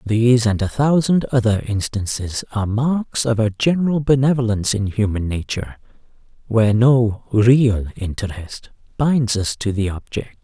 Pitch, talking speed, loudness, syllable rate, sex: 115 Hz, 140 wpm, -18 LUFS, 4.7 syllables/s, male